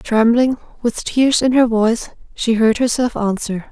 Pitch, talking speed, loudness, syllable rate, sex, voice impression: 230 Hz, 160 wpm, -16 LUFS, 4.4 syllables/s, female, feminine, slightly adult-like, soft, cute, slightly refreshing, calm, friendly, kind, slightly light